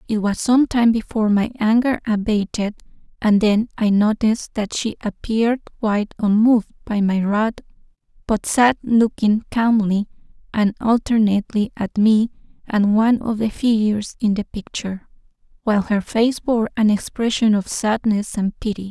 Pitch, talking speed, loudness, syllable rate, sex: 215 Hz, 145 wpm, -19 LUFS, 4.8 syllables/s, female